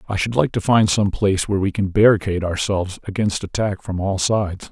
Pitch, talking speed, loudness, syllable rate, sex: 100 Hz, 215 wpm, -19 LUFS, 6.1 syllables/s, male